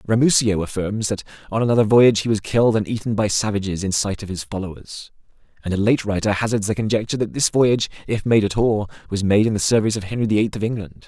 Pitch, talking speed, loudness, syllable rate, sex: 105 Hz, 235 wpm, -20 LUFS, 6.7 syllables/s, male